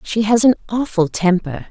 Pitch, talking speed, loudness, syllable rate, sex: 200 Hz, 175 wpm, -16 LUFS, 4.8 syllables/s, female